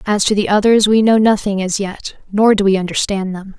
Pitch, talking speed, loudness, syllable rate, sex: 205 Hz, 235 wpm, -14 LUFS, 5.4 syllables/s, female